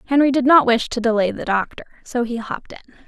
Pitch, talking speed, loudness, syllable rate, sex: 245 Hz, 235 wpm, -18 LUFS, 6.6 syllables/s, female